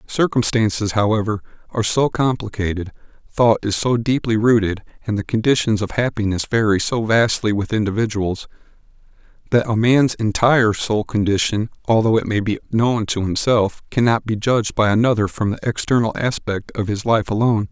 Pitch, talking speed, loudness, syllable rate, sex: 110 Hz, 155 wpm, -19 LUFS, 5.0 syllables/s, male